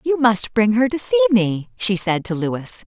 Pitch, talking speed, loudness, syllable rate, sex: 225 Hz, 225 wpm, -18 LUFS, 4.4 syllables/s, female